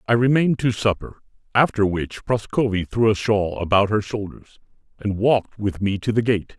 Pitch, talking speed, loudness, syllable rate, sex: 105 Hz, 180 wpm, -21 LUFS, 5.1 syllables/s, male